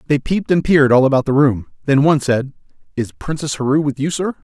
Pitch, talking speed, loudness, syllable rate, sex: 145 Hz, 225 wpm, -16 LUFS, 6.4 syllables/s, male